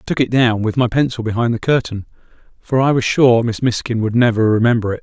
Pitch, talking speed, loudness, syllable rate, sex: 120 Hz, 240 wpm, -16 LUFS, 6.1 syllables/s, male